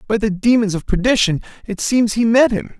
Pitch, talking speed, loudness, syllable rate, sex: 215 Hz, 215 wpm, -16 LUFS, 5.5 syllables/s, male